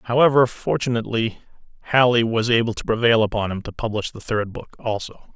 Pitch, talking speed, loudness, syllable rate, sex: 115 Hz, 170 wpm, -21 LUFS, 5.8 syllables/s, male